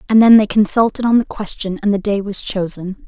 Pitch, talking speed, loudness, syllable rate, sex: 205 Hz, 235 wpm, -15 LUFS, 5.6 syllables/s, female